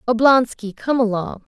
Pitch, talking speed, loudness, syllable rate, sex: 235 Hz, 115 wpm, -18 LUFS, 4.6 syllables/s, female